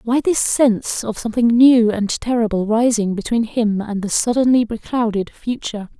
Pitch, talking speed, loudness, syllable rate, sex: 225 Hz, 160 wpm, -17 LUFS, 5.0 syllables/s, female